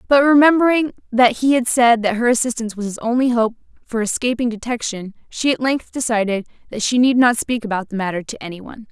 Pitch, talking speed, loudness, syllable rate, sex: 235 Hz, 210 wpm, -17 LUFS, 6.1 syllables/s, female